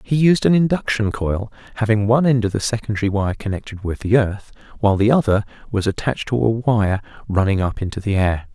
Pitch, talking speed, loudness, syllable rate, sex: 110 Hz, 205 wpm, -19 LUFS, 6.0 syllables/s, male